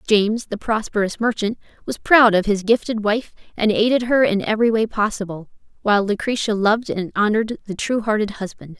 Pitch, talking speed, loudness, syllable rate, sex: 210 Hz, 175 wpm, -19 LUFS, 5.7 syllables/s, female